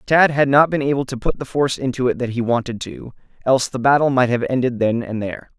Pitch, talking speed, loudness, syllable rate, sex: 125 Hz, 260 wpm, -19 LUFS, 6.3 syllables/s, male